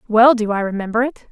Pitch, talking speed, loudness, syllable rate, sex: 225 Hz, 230 wpm, -17 LUFS, 6.1 syllables/s, female